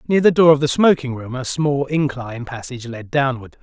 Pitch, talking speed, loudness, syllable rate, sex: 135 Hz, 215 wpm, -18 LUFS, 5.5 syllables/s, male